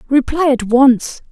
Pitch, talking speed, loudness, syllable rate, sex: 260 Hz, 135 wpm, -13 LUFS, 3.7 syllables/s, female